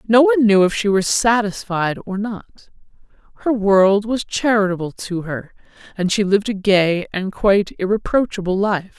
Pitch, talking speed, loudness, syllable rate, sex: 195 Hz, 160 wpm, -18 LUFS, 4.8 syllables/s, female